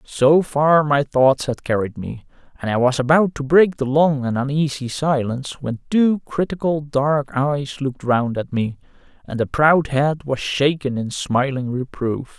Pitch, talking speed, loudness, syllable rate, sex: 140 Hz, 175 wpm, -19 LUFS, 4.2 syllables/s, male